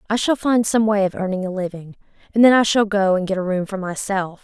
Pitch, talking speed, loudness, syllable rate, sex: 200 Hz, 270 wpm, -19 LUFS, 6.0 syllables/s, female